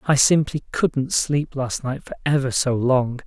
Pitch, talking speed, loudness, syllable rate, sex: 135 Hz, 185 wpm, -21 LUFS, 4.1 syllables/s, male